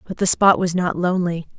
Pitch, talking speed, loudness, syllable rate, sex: 180 Hz, 230 wpm, -18 LUFS, 5.7 syllables/s, female